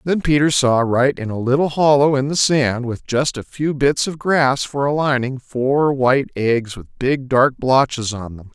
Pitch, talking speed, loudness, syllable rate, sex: 135 Hz, 210 wpm, -17 LUFS, 4.3 syllables/s, male